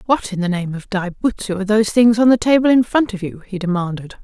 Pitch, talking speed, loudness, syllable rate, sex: 205 Hz, 270 wpm, -17 LUFS, 6.4 syllables/s, female